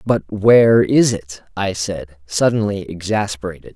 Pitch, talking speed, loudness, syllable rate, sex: 95 Hz, 130 wpm, -17 LUFS, 4.3 syllables/s, male